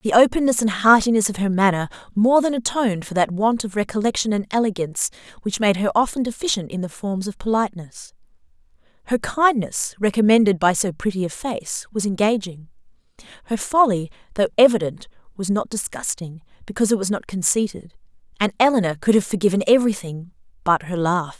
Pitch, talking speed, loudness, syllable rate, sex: 205 Hz, 165 wpm, -20 LUFS, 5.9 syllables/s, female